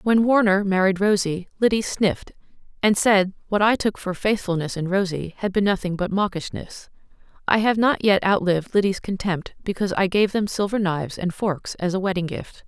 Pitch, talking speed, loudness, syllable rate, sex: 195 Hz, 185 wpm, -22 LUFS, 5.3 syllables/s, female